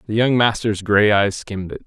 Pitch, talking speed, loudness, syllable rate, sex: 105 Hz, 225 wpm, -18 LUFS, 5.4 syllables/s, male